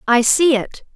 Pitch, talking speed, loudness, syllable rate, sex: 260 Hz, 190 wpm, -15 LUFS, 4.0 syllables/s, female